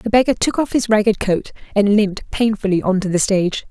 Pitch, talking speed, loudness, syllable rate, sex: 205 Hz, 225 wpm, -17 LUFS, 5.8 syllables/s, female